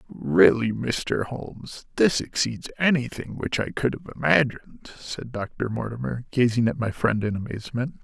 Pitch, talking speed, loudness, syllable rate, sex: 120 Hz, 150 wpm, -24 LUFS, 4.6 syllables/s, male